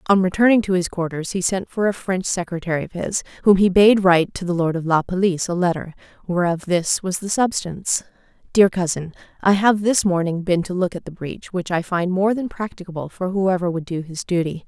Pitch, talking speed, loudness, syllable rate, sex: 180 Hz, 220 wpm, -20 LUFS, 5.6 syllables/s, female